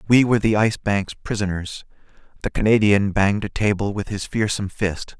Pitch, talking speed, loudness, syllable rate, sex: 100 Hz, 175 wpm, -21 LUFS, 5.6 syllables/s, male